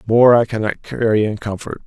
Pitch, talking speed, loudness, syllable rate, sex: 110 Hz, 195 wpm, -16 LUFS, 5.3 syllables/s, male